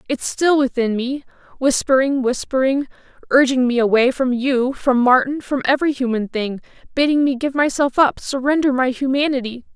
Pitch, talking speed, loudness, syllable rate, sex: 265 Hz, 150 wpm, -18 LUFS, 5.2 syllables/s, female